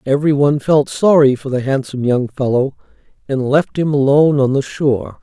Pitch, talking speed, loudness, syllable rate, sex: 140 Hz, 170 wpm, -15 LUFS, 5.5 syllables/s, male